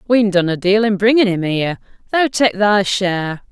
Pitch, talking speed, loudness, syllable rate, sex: 200 Hz, 190 wpm, -15 LUFS, 5.1 syllables/s, female